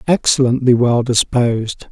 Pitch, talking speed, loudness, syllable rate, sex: 125 Hz, 95 wpm, -15 LUFS, 4.6 syllables/s, male